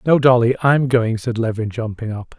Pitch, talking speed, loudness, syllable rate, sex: 120 Hz, 200 wpm, -18 LUFS, 5.0 syllables/s, male